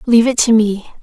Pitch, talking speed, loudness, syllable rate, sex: 225 Hz, 235 wpm, -13 LUFS, 5.9 syllables/s, female